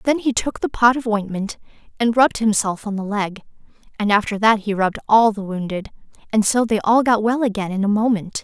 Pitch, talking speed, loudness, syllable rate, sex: 215 Hz, 220 wpm, -19 LUFS, 5.7 syllables/s, female